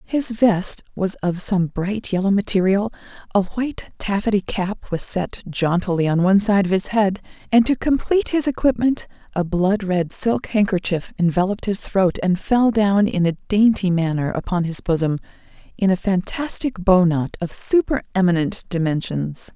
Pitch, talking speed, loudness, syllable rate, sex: 195 Hz, 165 wpm, -20 LUFS, 4.7 syllables/s, female